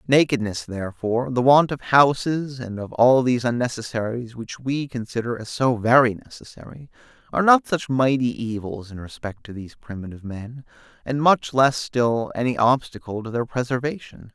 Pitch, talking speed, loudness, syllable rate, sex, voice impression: 125 Hz, 160 wpm, -21 LUFS, 5.2 syllables/s, male, very masculine, very adult-like, slightly thick, tensed, slightly powerful, bright, slightly hard, clear, fluent, slightly cool, intellectual, refreshing, sincere, calm, slightly mature, friendly, reassuring, unique, slightly elegant, wild, slightly sweet, slightly lively, kind, slightly modest